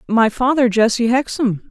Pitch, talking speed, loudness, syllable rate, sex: 235 Hz, 140 wpm, -16 LUFS, 4.6 syllables/s, female